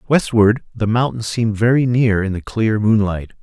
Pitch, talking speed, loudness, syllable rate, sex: 110 Hz, 175 wpm, -17 LUFS, 4.8 syllables/s, male